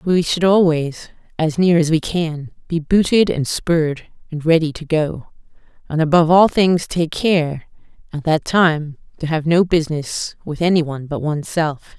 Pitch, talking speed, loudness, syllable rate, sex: 160 Hz, 175 wpm, -17 LUFS, 4.7 syllables/s, female